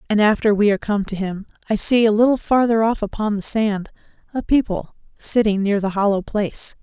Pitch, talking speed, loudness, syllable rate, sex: 210 Hz, 200 wpm, -19 LUFS, 5.6 syllables/s, female